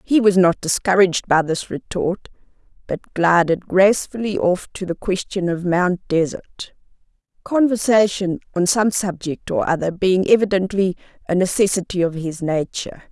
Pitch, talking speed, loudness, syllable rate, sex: 185 Hz, 135 wpm, -19 LUFS, 4.7 syllables/s, female